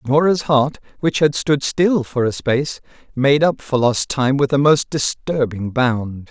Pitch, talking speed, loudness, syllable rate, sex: 135 Hz, 180 wpm, -18 LUFS, 4.1 syllables/s, male